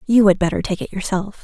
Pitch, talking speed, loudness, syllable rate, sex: 195 Hz, 250 wpm, -19 LUFS, 6.2 syllables/s, female